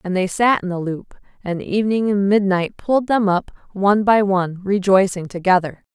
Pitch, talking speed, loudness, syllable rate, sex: 195 Hz, 180 wpm, -18 LUFS, 5.3 syllables/s, female